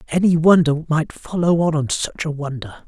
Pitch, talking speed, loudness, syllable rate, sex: 155 Hz, 165 wpm, -18 LUFS, 4.5 syllables/s, male